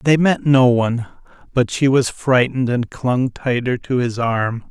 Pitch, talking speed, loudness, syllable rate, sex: 125 Hz, 180 wpm, -18 LUFS, 4.3 syllables/s, male